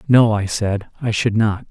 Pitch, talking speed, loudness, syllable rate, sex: 110 Hz, 210 wpm, -18 LUFS, 4.4 syllables/s, male